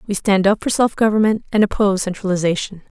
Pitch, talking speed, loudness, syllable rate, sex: 200 Hz, 180 wpm, -17 LUFS, 6.4 syllables/s, female